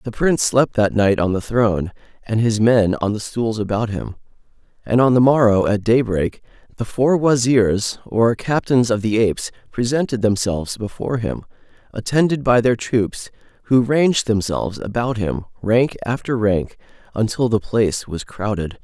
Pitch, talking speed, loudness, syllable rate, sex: 115 Hz, 160 wpm, -18 LUFS, 4.7 syllables/s, male